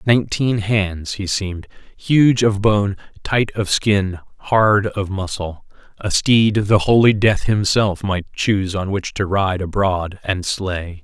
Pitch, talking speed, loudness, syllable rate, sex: 100 Hz, 145 wpm, -18 LUFS, 3.7 syllables/s, male